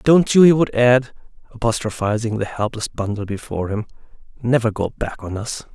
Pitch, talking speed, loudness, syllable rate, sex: 115 Hz, 165 wpm, -19 LUFS, 5.4 syllables/s, male